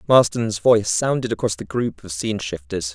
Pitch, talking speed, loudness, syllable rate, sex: 100 Hz, 185 wpm, -21 LUFS, 5.4 syllables/s, male